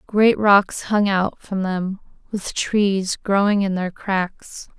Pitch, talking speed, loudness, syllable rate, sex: 195 Hz, 150 wpm, -20 LUFS, 3.1 syllables/s, female